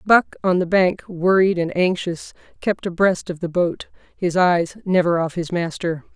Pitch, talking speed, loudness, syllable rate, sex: 175 Hz, 175 wpm, -20 LUFS, 4.3 syllables/s, female